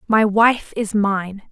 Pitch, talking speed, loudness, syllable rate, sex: 210 Hz, 160 wpm, -18 LUFS, 3.2 syllables/s, female